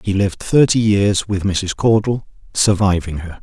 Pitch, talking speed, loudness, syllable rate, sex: 100 Hz, 160 wpm, -17 LUFS, 4.6 syllables/s, male